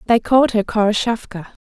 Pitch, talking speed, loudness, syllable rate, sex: 220 Hz, 150 wpm, -17 LUFS, 6.0 syllables/s, female